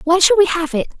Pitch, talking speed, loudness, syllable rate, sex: 345 Hz, 300 wpm, -14 LUFS, 6.3 syllables/s, female